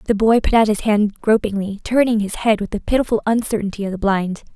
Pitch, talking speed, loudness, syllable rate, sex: 210 Hz, 225 wpm, -18 LUFS, 5.8 syllables/s, female